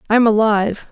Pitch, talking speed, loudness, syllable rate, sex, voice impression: 215 Hz, 195 wpm, -15 LUFS, 7.1 syllables/s, female, feminine, adult-like, tensed, powerful, clear, fluent, intellectual, calm, reassuring, modest